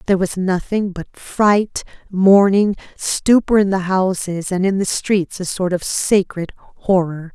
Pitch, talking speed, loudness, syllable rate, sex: 190 Hz, 155 wpm, -17 LUFS, 4.1 syllables/s, female